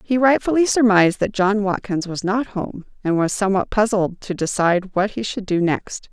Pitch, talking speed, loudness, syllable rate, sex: 200 Hz, 195 wpm, -19 LUFS, 5.2 syllables/s, female